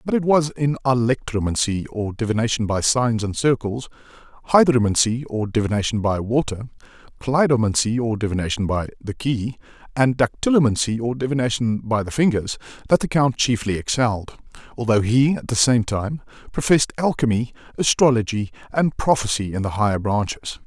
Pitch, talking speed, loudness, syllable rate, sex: 120 Hz, 140 wpm, -20 LUFS, 5.5 syllables/s, male